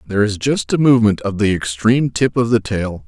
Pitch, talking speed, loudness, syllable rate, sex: 110 Hz, 235 wpm, -16 LUFS, 5.8 syllables/s, male